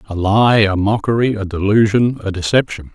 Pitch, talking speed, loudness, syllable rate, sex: 105 Hz, 165 wpm, -15 LUFS, 5.1 syllables/s, male